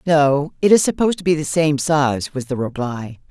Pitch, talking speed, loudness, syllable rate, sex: 150 Hz, 220 wpm, -18 LUFS, 5.0 syllables/s, female